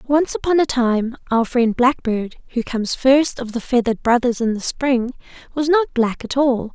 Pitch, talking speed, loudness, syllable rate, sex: 250 Hz, 195 wpm, -19 LUFS, 4.7 syllables/s, female